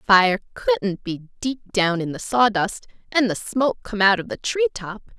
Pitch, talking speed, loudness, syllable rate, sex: 215 Hz, 195 wpm, -21 LUFS, 4.5 syllables/s, female